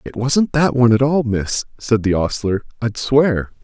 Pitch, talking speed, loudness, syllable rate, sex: 120 Hz, 200 wpm, -17 LUFS, 4.5 syllables/s, male